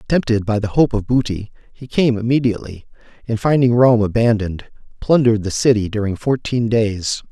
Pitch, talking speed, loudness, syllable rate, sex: 115 Hz, 155 wpm, -17 LUFS, 5.5 syllables/s, male